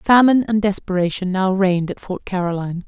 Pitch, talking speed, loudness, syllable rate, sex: 195 Hz, 165 wpm, -19 LUFS, 6.0 syllables/s, female